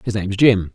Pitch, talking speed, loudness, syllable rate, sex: 105 Hz, 240 wpm, -16 LUFS, 6.2 syllables/s, male